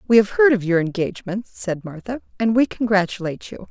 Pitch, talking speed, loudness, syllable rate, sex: 205 Hz, 195 wpm, -20 LUFS, 6.0 syllables/s, female